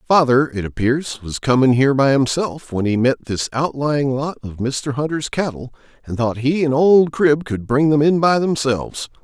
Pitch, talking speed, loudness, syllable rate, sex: 135 Hz, 195 wpm, -18 LUFS, 4.7 syllables/s, male